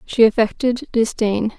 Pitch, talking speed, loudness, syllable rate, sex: 230 Hz, 115 wpm, -18 LUFS, 4.3 syllables/s, female